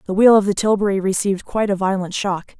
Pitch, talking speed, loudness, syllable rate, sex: 195 Hz, 230 wpm, -18 LUFS, 6.6 syllables/s, female